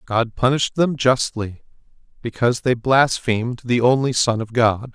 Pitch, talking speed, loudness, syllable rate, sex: 120 Hz, 145 wpm, -19 LUFS, 4.7 syllables/s, male